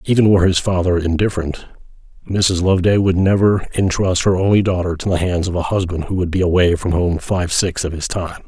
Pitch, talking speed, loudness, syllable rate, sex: 90 Hz, 210 wpm, -17 LUFS, 5.8 syllables/s, male